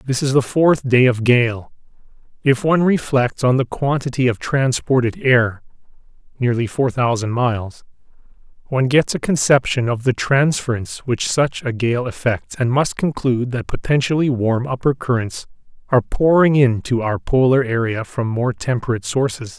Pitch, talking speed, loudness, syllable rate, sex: 125 Hz, 155 wpm, -18 LUFS, 4.7 syllables/s, male